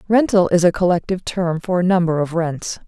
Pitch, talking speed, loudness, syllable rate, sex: 180 Hz, 210 wpm, -18 LUFS, 5.6 syllables/s, female